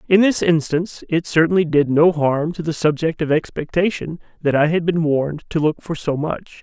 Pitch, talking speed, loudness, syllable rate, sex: 160 Hz, 210 wpm, -19 LUFS, 5.3 syllables/s, male